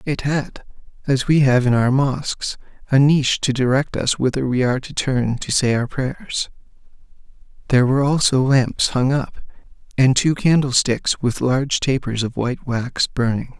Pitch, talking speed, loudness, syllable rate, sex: 130 Hz, 170 wpm, -19 LUFS, 4.7 syllables/s, male